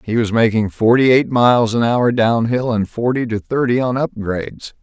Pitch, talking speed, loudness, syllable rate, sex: 115 Hz, 200 wpm, -16 LUFS, 4.9 syllables/s, male